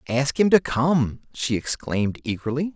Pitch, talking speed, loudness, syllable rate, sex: 135 Hz, 155 wpm, -23 LUFS, 4.6 syllables/s, male